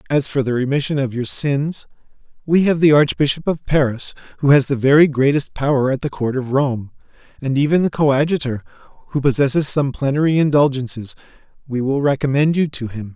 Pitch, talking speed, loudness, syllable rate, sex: 140 Hz, 180 wpm, -17 LUFS, 5.7 syllables/s, male